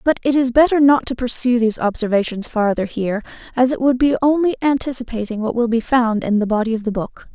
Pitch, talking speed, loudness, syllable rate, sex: 240 Hz, 220 wpm, -18 LUFS, 6.1 syllables/s, female